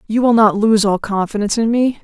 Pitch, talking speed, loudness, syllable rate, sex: 215 Hz, 235 wpm, -15 LUFS, 5.9 syllables/s, female